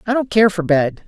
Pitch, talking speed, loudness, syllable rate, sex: 200 Hz, 280 wpm, -16 LUFS, 5.4 syllables/s, female